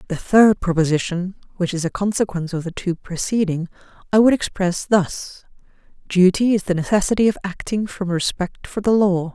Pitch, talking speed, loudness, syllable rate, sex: 190 Hz, 165 wpm, -19 LUFS, 5.3 syllables/s, female